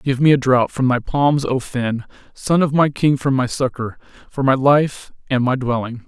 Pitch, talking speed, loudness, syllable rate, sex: 130 Hz, 215 wpm, -18 LUFS, 4.6 syllables/s, male